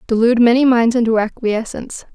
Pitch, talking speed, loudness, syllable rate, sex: 235 Hz, 140 wpm, -15 LUFS, 6.2 syllables/s, female